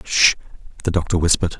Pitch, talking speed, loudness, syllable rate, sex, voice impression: 85 Hz, 150 wpm, -18 LUFS, 7.1 syllables/s, male, masculine, adult-like, cool, sincere, calm, reassuring, sweet